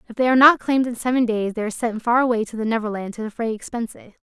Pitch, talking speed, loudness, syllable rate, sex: 230 Hz, 265 wpm, -20 LUFS, 7.6 syllables/s, female